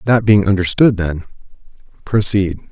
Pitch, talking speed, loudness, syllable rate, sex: 100 Hz, 110 wpm, -15 LUFS, 4.8 syllables/s, male